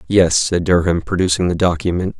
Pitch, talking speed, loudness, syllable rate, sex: 90 Hz, 165 wpm, -16 LUFS, 5.4 syllables/s, male